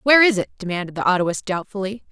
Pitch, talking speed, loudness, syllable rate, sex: 200 Hz, 200 wpm, -20 LUFS, 6.8 syllables/s, female